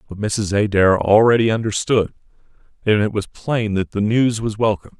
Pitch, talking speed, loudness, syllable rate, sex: 105 Hz, 170 wpm, -18 LUFS, 5.2 syllables/s, male